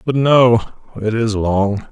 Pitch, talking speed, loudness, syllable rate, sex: 110 Hz, 125 wpm, -15 LUFS, 3.1 syllables/s, male